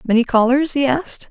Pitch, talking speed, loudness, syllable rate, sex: 255 Hz, 185 wpm, -16 LUFS, 5.8 syllables/s, female